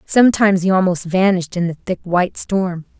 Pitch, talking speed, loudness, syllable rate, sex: 185 Hz, 180 wpm, -17 LUFS, 5.8 syllables/s, female